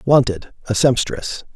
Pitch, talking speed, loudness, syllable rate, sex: 120 Hz, 115 wpm, -19 LUFS, 4.1 syllables/s, male